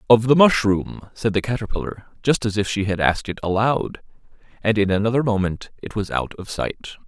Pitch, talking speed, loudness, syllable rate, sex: 105 Hz, 195 wpm, -21 LUFS, 5.7 syllables/s, male